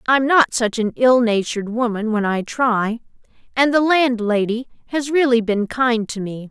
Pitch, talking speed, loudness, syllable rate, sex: 235 Hz, 175 wpm, -18 LUFS, 4.5 syllables/s, female